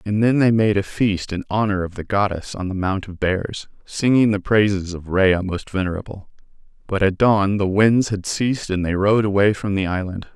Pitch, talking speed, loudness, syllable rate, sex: 100 Hz, 215 wpm, -20 LUFS, 5.1 syllables/s, male